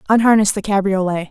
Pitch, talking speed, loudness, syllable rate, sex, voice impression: 200 Hz, 140 wpm, -16 LUFS, 6.3 syllables/s, female, feminine, adult-like, clear, intellectual, slightly strict